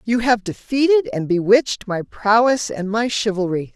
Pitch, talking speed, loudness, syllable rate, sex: 225 Hz, 160 wpm, -18 LUFS, 4.7 syllables/s, female